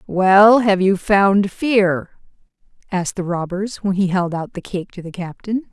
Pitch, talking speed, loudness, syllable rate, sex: 190 Hz, 180 wpm, -17 LUFS, 4.1 syllables/s, female